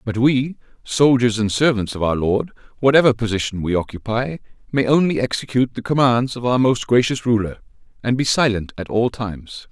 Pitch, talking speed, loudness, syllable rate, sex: 120 Hz, 175 wpm, -19 LUFS, 5.4 syllables/s, male